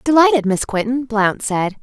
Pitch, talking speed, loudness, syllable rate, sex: 230 Hz, 165 wpm, -17 LUFS, 4.6 syllables/s, female